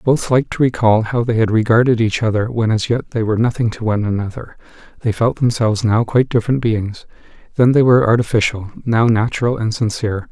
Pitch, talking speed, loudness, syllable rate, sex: 115 Hz, 200 wpm, -16 LUFS, 6.3 syllables/s, male